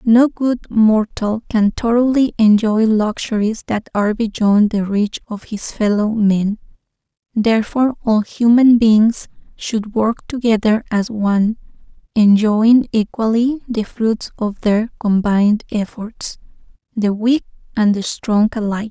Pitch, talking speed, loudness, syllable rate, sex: 220 Hz, 125 wpm, -16 LUFS, 4.0 syllables/s, female